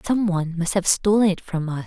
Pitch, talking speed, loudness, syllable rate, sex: 185 Hz, 255 wpm, -21 LUFS, 6.0 syllables/s, female